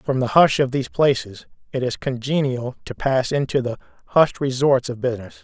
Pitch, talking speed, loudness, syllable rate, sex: 130 Hz, 190 wpm, -21 LUFS, 5.4 syllables/s, male